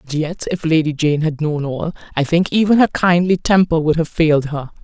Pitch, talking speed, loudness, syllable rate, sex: 160 Hz, 225 wpm, -16 LUFS, 5.3 syllables/s, female